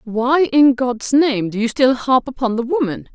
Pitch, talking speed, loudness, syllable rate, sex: 250 Hz, 210 wpm, -16 LUFS, 4.3 syllables/s, female